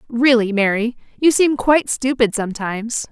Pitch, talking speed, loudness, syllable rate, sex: 240 Hz, 135 wpm, -17 LUFS, 5.2 syllables/s, female